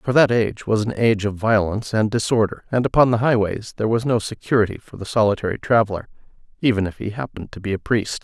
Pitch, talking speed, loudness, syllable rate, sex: 110 Hz, 220 wpm, -20 LUFS, 6.6 syllables/s, male